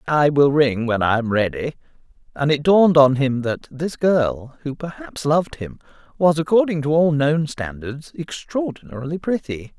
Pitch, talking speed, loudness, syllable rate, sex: 145 Hz, 165 wpm, -19 LUFS, 4.7 syllables/s, male